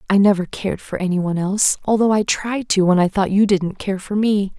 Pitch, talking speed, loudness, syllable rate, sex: 195 Hz, 225 wpm, -18 LUFS, 5.6 syllables/s, female